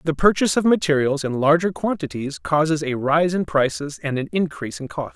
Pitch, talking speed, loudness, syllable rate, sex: 150 Hz, 200 wpm, -21 LUFS, 5.6 syllables/s, male